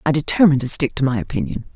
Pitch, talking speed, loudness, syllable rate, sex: 135 Hz, 240 wpm, -18 LUFS, 7.6 syllables/s, female